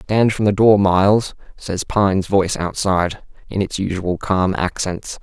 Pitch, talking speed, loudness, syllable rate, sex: 95 Hz, 160 wpm, -18 LUFS, 4.5 syllables/s, male